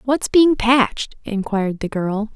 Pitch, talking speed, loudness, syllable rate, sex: 230 Hz, 155 wpm, -18 LUFS, 4.2 syllables/s, female